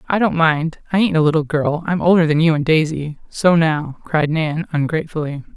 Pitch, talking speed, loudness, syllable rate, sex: 160 Hz, 205 wpm, -17 LUFS, 5.2 syllables/s, female